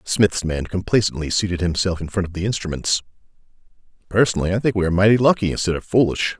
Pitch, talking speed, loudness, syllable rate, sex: 95 Hz, 190 wpm, -20 LUFS, 6.7 syllables/s, male